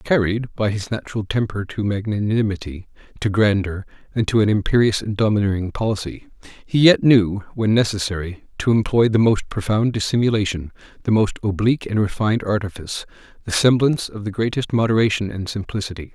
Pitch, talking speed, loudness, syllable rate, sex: 105 Hz, 150 wpm, -20 LUFS, 5.8 syllables/s, male